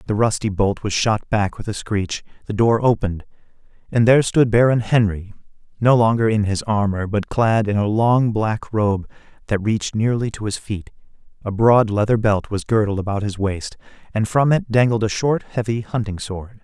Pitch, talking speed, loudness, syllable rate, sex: 110 Hz, 190 wpm, -19 LUFS, 5.0 syllables/s, male